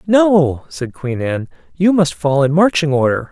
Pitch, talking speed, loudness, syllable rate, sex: 155 Hz, 180 wpm, -15 LUFS, 4.2 syllables/s, male